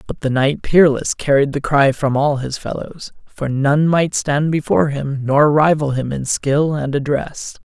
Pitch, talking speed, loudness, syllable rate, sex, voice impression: 145 Hz, 190 wpm, -17 LUFS, 4.3 syllables/s, male, masculine, adult-like, powerful, slightly muffled, raspy, intellectual, mature, friendly, wild, lively